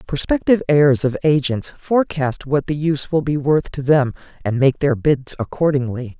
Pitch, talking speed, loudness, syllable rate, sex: 145 Hz, 175 wpm, -18 LUFS, 5.2 syllables/s, female